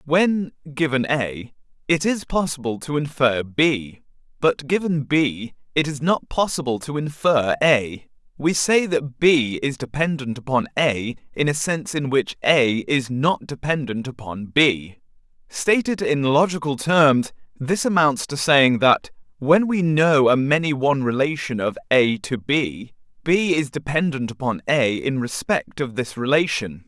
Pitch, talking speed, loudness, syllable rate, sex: 140 Hz, 150 wpm, -20 LUFS, 4.1 syllables/s, male